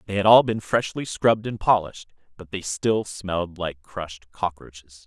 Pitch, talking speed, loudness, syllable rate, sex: 95 Hz, 180 wpm, -23 LUFS, 5.0 syllables/s, male